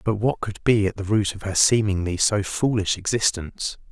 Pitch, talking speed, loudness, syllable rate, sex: 100 Hz, 200 wpm, -22 LUFS, 5.2 syllables/s, male